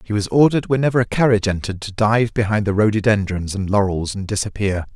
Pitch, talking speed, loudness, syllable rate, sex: 105 Hz, 195 wpm, -18 LUFS, 6.5 syllables/s, male